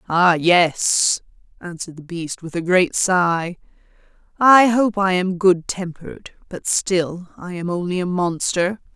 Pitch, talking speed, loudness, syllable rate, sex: 180 Hz, 145 wpm, -18 LUFS, 3.9 syllables/s, female